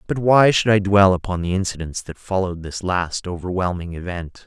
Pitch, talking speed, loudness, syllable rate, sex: 95 Hz, 190 wpm, -20 LUFS, 5.3 syllables/s, male